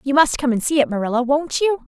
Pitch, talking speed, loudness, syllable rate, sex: 275 Hz, 245 wpm, -19 LUFS, 6.2 syllables/s, female